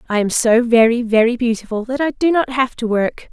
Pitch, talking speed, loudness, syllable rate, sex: 240 Hz, 235 wpm, -16 LUFS, 5.5 syllables/s, female